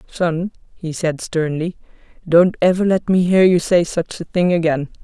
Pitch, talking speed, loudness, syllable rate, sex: 170 Hz, 180 wpm, -17 LUFS, 4.6 syllables/s, female